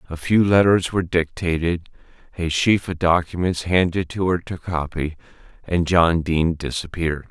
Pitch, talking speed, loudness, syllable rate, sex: 85 Hz, 150 wpm, -20 LUFS, 4.9 syllables/s, male